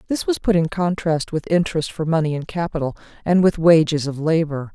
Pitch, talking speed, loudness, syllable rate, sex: 165 Hz, 200 wpm, -20 LUFS, 5.7 syllables/s, female